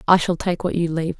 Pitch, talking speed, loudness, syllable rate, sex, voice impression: 170 Hz, 300 wpm, -21 LUFS, 6.8 syllables/s, female, feminine, adult-like, slightly cool, slightly sincere, calm, slightly sweet